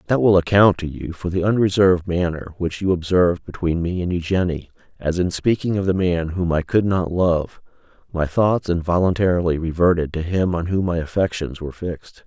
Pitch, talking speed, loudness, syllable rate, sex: 90 Hz, 190 wpm, -20 LUFS, 5.4 syllables/s, male